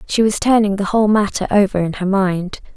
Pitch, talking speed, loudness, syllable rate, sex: 200 Hz, 215 wpm, -16 LUFS, 5.8 syllables/s, female